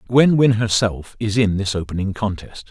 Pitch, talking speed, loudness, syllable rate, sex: 105 Hz, 180 wpm, -19 LUFS, 4.8 syllables/s, male